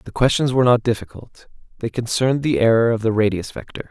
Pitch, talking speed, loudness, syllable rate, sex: 120 Hz, 200 wpm, -19 LUFS, 6.2 syllables/s, male